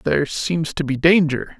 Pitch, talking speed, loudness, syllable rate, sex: 150 Hz, 190 wpm, -19 LUFS, 4.8 syllables/s, male